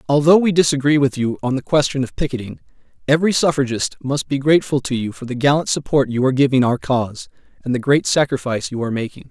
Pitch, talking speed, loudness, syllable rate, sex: 135 Hz, 215 wpm, -18 LUFS, 6.7 syllables/s, male